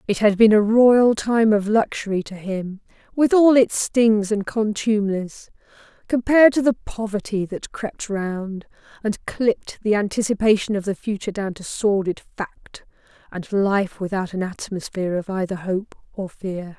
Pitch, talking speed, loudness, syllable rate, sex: 205 Hz, 155 wpm, -20 LUFS, 4.5 syllables/s, female